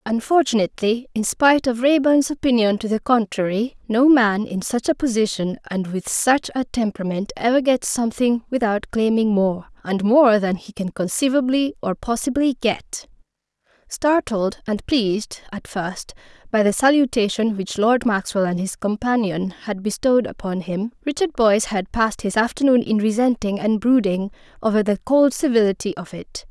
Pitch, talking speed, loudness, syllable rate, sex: 225 Hz, 155 wpm, -20 LUFS, 5.0 syllables/s, female